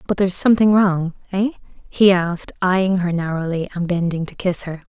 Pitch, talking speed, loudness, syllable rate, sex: 185 Hz, 170 wpm, -19 LUFS, 5.5 syllables/s, female